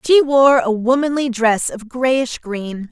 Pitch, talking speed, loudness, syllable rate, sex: 250 Hz, 165 wpm, -16 LUFS, 3.6 syllables/s, female